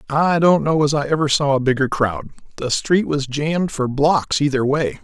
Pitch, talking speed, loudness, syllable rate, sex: 145 Hz, 215 wpm, -18 LUFS, 4.8 syllables/s, male